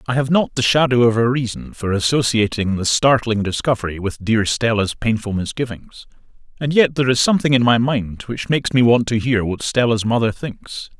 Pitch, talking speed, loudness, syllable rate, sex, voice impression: 115 Hz, 190 wpm, -18 LUFS, 5.4 syllables/s, male, very masculine, very middle-aged, very thick, tensed, very powerful, bright, soft, very clear, fluent, slightly raspy, very cool, intellectual, refreshing, sincere, very calm, very mature, very friendly, reassuring, very unique, elegant, wild, sweet, lively, kind